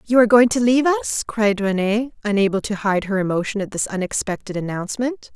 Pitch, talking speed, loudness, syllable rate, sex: 215 Hz, 190 wpm, -20 LUFS, 5.9 syllables/s, female